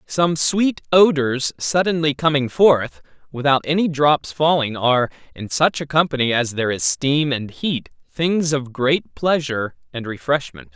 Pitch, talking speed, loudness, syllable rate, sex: 140 Hz, 150 wpm, -19 LUFS, 4.4 syllables/s, male